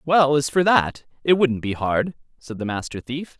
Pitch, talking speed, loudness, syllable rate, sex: 135 Hz, 210 wpm, -21 LUFS, 4.5 syllables/s, male